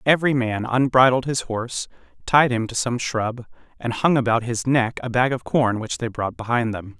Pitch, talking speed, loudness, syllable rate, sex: 120 Hz, 205 wpm, -21 LUFS, 5.1 syllables/s, male